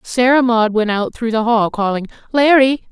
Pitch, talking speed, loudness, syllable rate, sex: 235 Hz, 185 wpm, -15 LUFS, 4.7 syllables/s, female